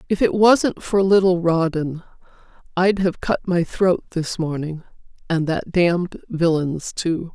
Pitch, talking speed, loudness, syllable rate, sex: 175 Hz, 140 wpm, -20 LUFS, 4.0 syllables/s, female